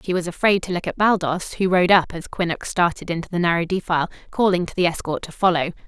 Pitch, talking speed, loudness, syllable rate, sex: 175 Hz, 235 wpm, -21 LUFS, 6.4 syllables/s, female